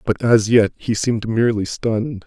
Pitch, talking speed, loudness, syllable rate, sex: 110 Hz, 185 wpm, -18 LUFS, 5.2 syllables/s, male